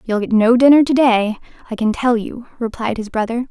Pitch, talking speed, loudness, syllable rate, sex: 235 Hz, 220 wpm, -16 LUFS, 5.4 syllables/s, female